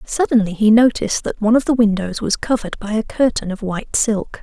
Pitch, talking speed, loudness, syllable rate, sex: 220 Hz, 215 wpm, -17 LUFS, 6.0 syllables/s, female